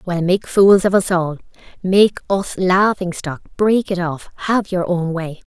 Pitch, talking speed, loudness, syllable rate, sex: 185 Hz, 185 wpm, -17 LUFS, 4.0 syllables/s, female